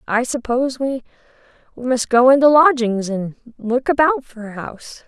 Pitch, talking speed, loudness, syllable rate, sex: 250 Hz, 155 wpm, -16 LUFS, 4.6 syllables/s, female